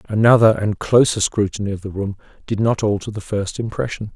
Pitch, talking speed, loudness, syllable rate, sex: 105 Hz, 190 wpm, -19 LUFS, 5.6 syllables/s, male